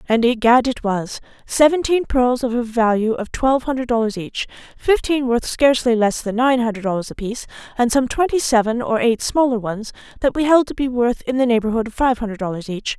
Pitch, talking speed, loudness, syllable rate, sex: 240 Hz, 210 wpm, -18 LUFS, 5.6 syllables/s, female